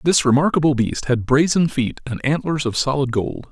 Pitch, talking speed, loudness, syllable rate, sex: 140 Hz, 190 wpm, -19 LUFS, 5.1 syllables/s, male